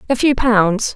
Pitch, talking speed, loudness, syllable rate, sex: 225 Hz, 190 wpm, -15 LUFS, 3.9 syllables/s, female